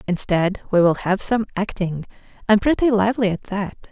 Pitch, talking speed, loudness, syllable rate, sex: 200 Hz, 155 wpm, -20 LUFS, 5.0 syllables/s, female